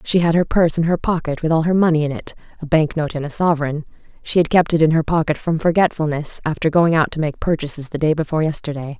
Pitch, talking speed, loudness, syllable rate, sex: 160 Hz, 245 wpm, -18 LUFS, 6.6 syllables/s, female